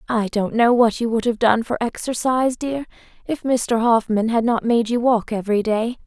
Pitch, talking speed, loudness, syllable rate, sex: 230 Hz, 210 wpm, -19 LUFS, 5.0 syllables/s, female